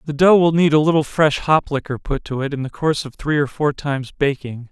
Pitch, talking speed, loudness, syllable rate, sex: 145 Hz, 265 wpm, -18 LUFS, 5.7 syllables/s, male